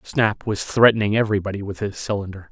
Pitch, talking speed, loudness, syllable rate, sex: 100 Hz, 165 wpm, -21 LUFS, 6.2 syllables/s, male